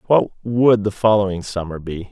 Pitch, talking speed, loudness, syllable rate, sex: 100 Hz, 170 wpm, -18 LUFS, 5.0 syllables/s, male